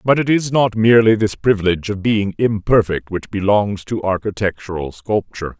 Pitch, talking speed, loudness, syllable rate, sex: 105 Hz, 160 wpm, -17 LUFS, 5.3 syllables/s, male